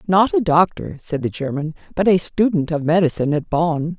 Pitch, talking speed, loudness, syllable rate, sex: 170 Hz, 195 wpm, -19 LUFS, 5.3 syllables/s, female